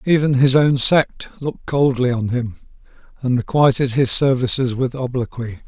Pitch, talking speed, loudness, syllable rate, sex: 130 Hz, 150 wpm, -18 LUFS, 4.9 syllables/s, male